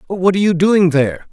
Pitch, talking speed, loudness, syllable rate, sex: 180 Hz, 225 wpm, -14 LUFS, 6.2 syllables/s, male